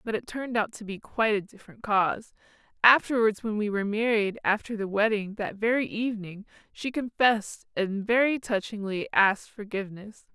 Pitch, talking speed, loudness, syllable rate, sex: 215 Hz, 160 wpm, -26 LUFS, 5.5 syllables/s, female